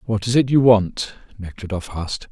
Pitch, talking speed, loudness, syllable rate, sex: 105 Hz, 180 wpm, -19 LUFS, 5.1 syllables/s, male